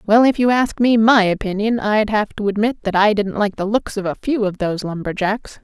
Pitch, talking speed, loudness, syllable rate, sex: 210 Hz, 245 wpm, -18 LUFS, 5.5 syllables/s, female